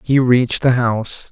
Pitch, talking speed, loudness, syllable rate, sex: 125 Hz, 185 wpm, -16 LUFS, 5.0 syllables/s, male